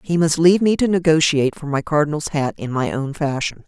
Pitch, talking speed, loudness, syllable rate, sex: 155 Hz, 230 wpm, -18 LUFS, 5.9 syllables/s, female